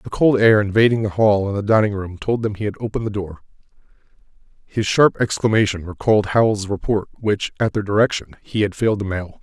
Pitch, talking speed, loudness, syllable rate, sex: 105 Hz, 205 wpm, -19 LUFS, 6.2 syllables/s, male